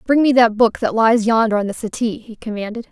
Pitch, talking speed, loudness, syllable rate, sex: 225 Hz, 245 wpm, -17 LUFS, 5.7 syllables/s, female